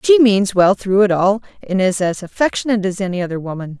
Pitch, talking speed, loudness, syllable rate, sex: 200 Hz, 220 wpm, -16 LUFS, 6.0 syllables/s, female